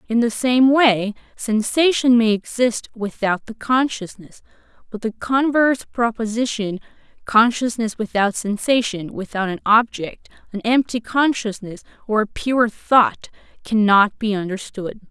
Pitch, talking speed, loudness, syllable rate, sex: 225 Hz, 120 wpm, -19 LUFS, 4.2 syllables/s, female